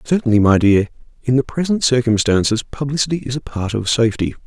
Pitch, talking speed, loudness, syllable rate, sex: 125 Hz, 175 wpm, -17 LUFS, 6.1 syllables/s, male